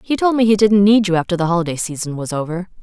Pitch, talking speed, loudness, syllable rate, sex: 190 Hz, 275 wpm, -16 LUFS, 6.8 syllables/s, female